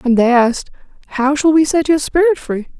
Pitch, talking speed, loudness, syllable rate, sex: 280 Hz, 215 wpm, -14 LUFS, 5.6 syllables/s, female